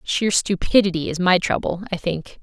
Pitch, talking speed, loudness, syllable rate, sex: 180 Hz, 175 wpm, -20 LUFS, 4.9 syllables/s, female